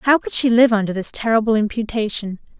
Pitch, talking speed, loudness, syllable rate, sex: 225 Hz, 185 wpm, -18 LUFS, 5.9 syllables/s, female